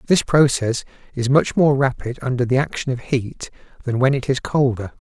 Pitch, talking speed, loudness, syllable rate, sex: 130 Hz, 190 wpm, -19 LUFS, 5.1 syllables/s, male